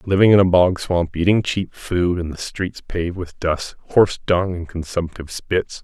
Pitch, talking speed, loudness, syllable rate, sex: 90 Hz, 175 wpm, -19 LUFS, 4.7 syllables/s, male